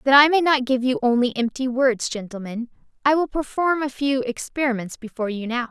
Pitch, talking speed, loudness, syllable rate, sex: 255 Hz, 200 wpm, -21 LUFS, 5.5 syllables/s, female